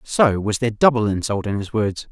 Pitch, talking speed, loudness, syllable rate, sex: 110 Hz, 225 wpm, -20 LUFS, 5.5 syllables/s, male